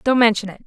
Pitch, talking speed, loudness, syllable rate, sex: 225 Hz, 270 wpm, -17 LUFS, 7.0 syllables/s, female